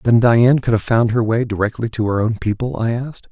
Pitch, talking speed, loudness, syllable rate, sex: 115 Hz, 255 wpm, -17 LUFS, 5.7 syllables/s, male